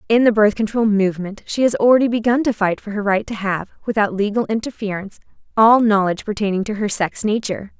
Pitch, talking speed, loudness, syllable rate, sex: 210 Hz, 200 wpm, -18 LUFS, 6.3 syllables/s, female